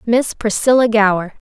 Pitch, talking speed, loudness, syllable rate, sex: 220 Hz, 120 wpm, -15 LUFS, 4.7 syllables/s, female